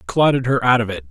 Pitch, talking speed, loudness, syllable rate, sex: 115 Hz, 270 wpm, -17 LUFS, 6.7 syllables/s, male